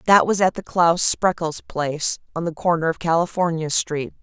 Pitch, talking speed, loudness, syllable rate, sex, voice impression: 170 Hz, 185 wpm, -20 LUFS, 4.9 syllables/s, female, very feminine, very adult-like, middle-aged, thin, tensed, very powerful, bright, very hard, clear, fluent, cool, very intellectual, slightly refreshing, very sincere, calm, very reassuring, unique, elegant, slightly wild, slightly lively, strict, slightly intense, sharp